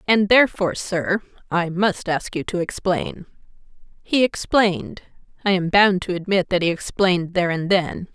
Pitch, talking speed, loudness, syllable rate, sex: 190 Hz, 160 wpm, -20 LUFS, 4.9 syllables/s, female